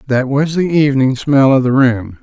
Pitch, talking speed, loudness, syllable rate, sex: 135 Hz, 215 wpm, -13 LUFS, 5.0 syllables/s, male